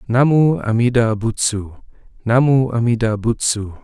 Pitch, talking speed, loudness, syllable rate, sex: 115 Hz, 95 wpm, -17 LUFS, 4.4 syllables/s, male